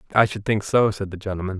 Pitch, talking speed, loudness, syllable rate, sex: 100 Hz, 265 wpm, -22 LUFS, 6.7 syllables/s, male